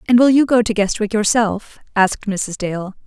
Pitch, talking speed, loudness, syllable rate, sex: 215 Hz, 195 wpm, -17 LUFS, 4.9 syllables/s, female